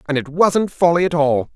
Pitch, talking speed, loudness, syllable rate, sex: 160 Hz, 230 wpm, -17 LUFS, 5.2 syllables/s, male